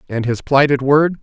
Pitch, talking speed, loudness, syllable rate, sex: 140 Hz, 195 wpm, -15 LUFS, 5.1 syllables/s, male